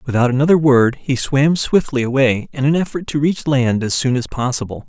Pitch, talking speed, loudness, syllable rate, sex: 135 Hz, 210 wpm, -16 LUFS, 5.3 syllables/s, male